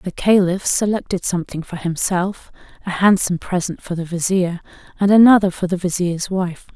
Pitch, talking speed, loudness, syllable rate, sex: 185 Hz, 160 wpm, -18 LUFS, 5.3 syllables/s, female